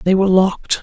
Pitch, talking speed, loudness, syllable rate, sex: 190 Hz, 220 wpm, -15 LUFS, 7.0 syllables/s, female